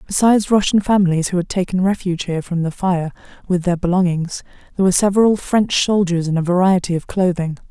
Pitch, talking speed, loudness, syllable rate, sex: 185 Hz, 185 wpm, -17 LUFS, 6.3 syllables/s, female